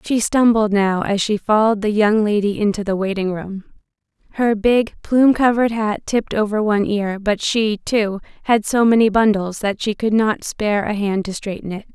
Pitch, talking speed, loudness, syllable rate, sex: 210 Hz, 195 wpm, -18 LUFS, 5.1 syllables/s, female